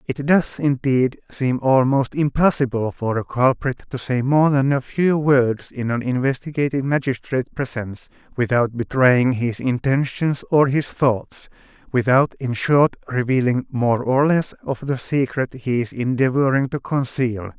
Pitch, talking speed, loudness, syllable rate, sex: 130 Hz, 145 wpm, -20 LUFS, 4.3 syllables/s, male